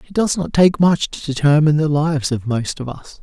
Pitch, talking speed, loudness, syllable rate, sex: 150 Hz, 240 wpm, -17 LUFS, 5.5 syllables/s, male